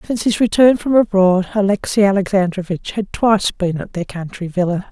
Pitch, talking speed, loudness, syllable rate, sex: 195 Hz, 170 wpm, -16 LUFS, 5.6 syllables/s, female